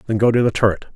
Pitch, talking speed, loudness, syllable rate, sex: 110 Hz, 315 wpm, -17 LUFS, 8.5 syllables/s, male